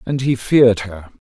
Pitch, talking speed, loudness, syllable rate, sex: 115 Hz, 190 wpm, -15 LUFS, 4.9 syllables/s, male